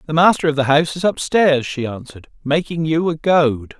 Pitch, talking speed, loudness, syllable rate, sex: 155 Hz, 205 wpm, -17 LUFS, 5.4 syllables/s, male